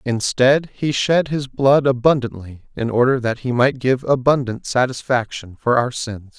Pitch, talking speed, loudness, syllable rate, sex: 125 Hz, 160 wpm, -18 LUFS, 4.4 syllables/s, male